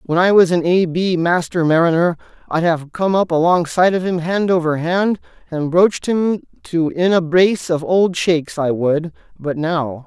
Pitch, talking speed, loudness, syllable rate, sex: 170 Hz, 190 wpm, -17 LUFS, 4.8 syllables/s, male